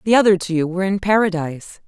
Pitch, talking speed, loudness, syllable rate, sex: 185 Hz, 195 wpm, -18 LUFS, 6.4 syllables/s, female